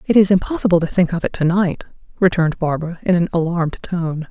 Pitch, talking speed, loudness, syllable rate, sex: 175 Hz, 210 wpm, -18 LUFS, 6.5 syllables/s, female